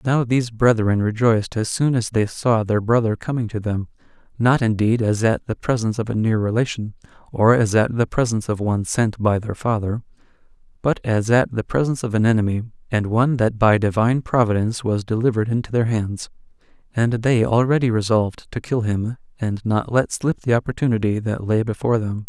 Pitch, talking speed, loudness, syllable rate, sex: 115 Hz, 190 wpm, -20 LUFS, 5.7 syllables/s, male